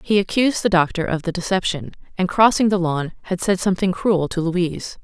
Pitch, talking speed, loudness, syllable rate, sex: 180 Hz, 200 wpm, -20 LUFS, 5.8 syllables/s, female